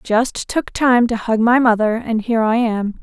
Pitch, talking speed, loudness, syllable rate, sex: 230 Hz, 220 wpm, -16 LUFS, 4.5 syllables/s, female